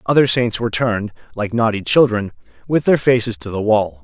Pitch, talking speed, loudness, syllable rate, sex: 110 Hz, 195 wpm, -17 LUFS, 5.6 syllables/s, male